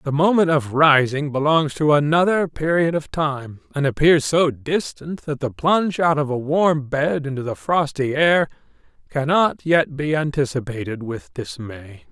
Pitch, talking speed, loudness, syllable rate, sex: 145 Hz, 160 wpm, -19 LUFS, 4.4 syllables/s, male